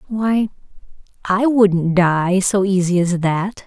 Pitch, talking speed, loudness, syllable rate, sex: 190 Hz, 130 wpm, -17 LUFS, 3.3 syllables/s, female